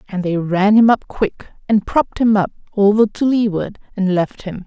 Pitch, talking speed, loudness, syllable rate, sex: 205 Hz, 205 wpm, -16 LUFS, 4.9 syllables/s, female